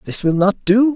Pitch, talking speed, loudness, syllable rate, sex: 210 Hz, 250 wpm, -16 LUFS, 4.9 syllables/s, male